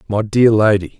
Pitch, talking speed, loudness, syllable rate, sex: 105 Hz, 180 wpm, -14 LUFS, 4.8 syllables/s, male